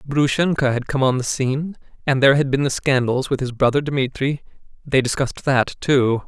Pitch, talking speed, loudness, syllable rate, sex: 135 Hz, 180 wpm, -19 LUFS, 5.5 syllables/s, male